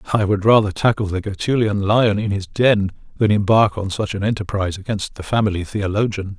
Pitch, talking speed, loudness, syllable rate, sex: 100 Hz, 190 wpm, -19 LUFS, 5.6 syllables/s, male